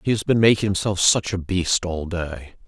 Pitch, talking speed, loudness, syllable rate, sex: 95 Hz, 225 wpm, -20 LUFS, 4.8 syllables/s, male